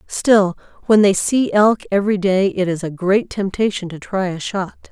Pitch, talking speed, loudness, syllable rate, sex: 195 Hz, 195 wpm, -17 LUFS, 4.6 syllables/s, female